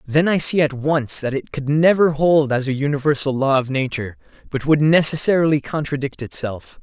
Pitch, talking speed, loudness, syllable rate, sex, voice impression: 145 Hz, 185 wpm, -18 LUFS, 5.3 syllables/s, male, masculine, adult-like, slightly bright, slightly clear, slightly cool, refreshing, friendly, slightly lively